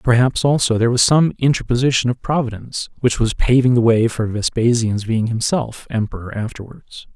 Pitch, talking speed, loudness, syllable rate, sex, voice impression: 120 Hz, 160 wpm, -17 LUFS, 5.4 syllables/s, male, masculine, middle-aged, slightly thick, relaxed, slightly weak, fluent, cool, sincere, calm, slightly mature, reassuring, elegant, wild, kind, slightly modest